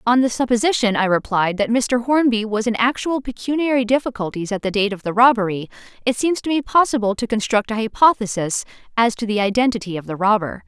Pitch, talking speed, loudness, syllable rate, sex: 225 Hz, 195 wpm, -19 LUFS, 6.0 syllables/s, female